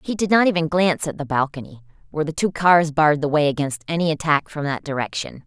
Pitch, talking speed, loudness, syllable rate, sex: 155 Hz, 230 wpm, -20 LUFS, 6.4 syllables/s, female